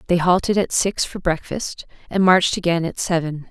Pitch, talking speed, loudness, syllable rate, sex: 175 Hz, 190 wpm, -19 LUFS, 5.2 syllables/s, female